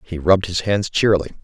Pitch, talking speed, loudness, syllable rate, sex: 90 Hz, 210 wpm, -18 LUFS, 6.1 syllables/s, male